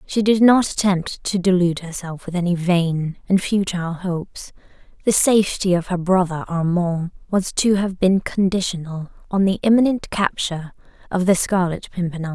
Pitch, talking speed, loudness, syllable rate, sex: 185 Hz, 155 wpm, -20 LUFS, 5.0 syllables/s, female